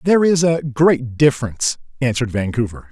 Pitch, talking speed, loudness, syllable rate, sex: 135 Hz, 145 wpm, -17 LUFS, 5.9 syllables/s, male